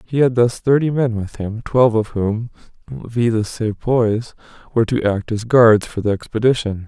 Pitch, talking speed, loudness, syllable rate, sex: 115 Hz, 185 wpm, -18 LUFS, 4.7 syllables/s, male